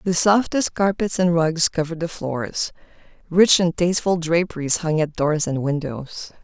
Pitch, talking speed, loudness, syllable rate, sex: 165 Hz, 160 wpm, -20 LUFS, 4.6 syllables/s, female